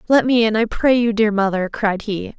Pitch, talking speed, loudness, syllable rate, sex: 215 Hz, 250 wpm, -18 LUFS, 5.1 syllables/s, female